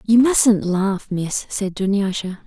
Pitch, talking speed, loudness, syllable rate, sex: 200 Hz, 145 wpm, -19 LUFS, 3.5 syllables/s, female